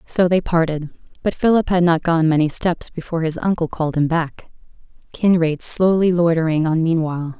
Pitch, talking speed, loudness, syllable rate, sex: 165 Hz, 170 wpm, -18 LUFS, 5.4 syllables/s, female